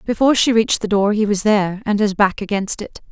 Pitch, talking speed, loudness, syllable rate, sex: 210 Hz, 230 wpm, -17 LUFS, 6.3 syllables/s, female